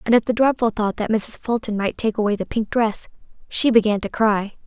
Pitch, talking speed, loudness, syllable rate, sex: 220 Hz, 230 wpm, -20 LUFS, 5.4 syllables/s, female